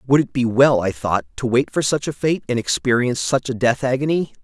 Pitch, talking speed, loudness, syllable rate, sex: 130 Hz, 245 wpm, -19 LUFS, 5.6 syllables/s, male